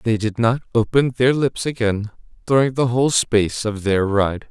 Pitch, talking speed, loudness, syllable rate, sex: 115 Hz, 185 wpm, -19 LUFS, 4.9 syllables/s, male